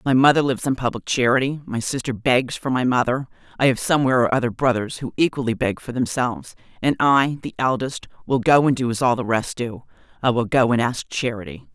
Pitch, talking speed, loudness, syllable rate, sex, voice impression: 125 Hz, 210 wpm, -21 LUFS, 5.9 syllables/s, female, slightly gender-neutral, slightly middle-aged, tensed, clear, calm, elegant